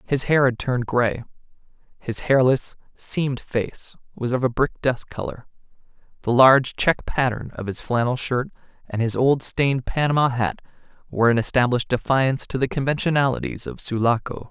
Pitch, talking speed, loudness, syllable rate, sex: 130 Hz, 155 wpm, -22 LUFS, 5.3 syllables/s, male